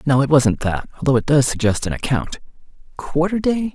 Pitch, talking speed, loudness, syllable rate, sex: 145 Hz, 175 wpm, -18 LUFS, 5.3 syllables/s, male